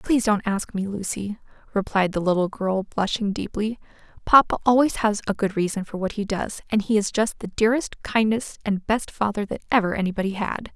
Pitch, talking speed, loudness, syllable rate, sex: 205 Hz, 195 wpm, -23 LUFS, 5.5 syllables/s, female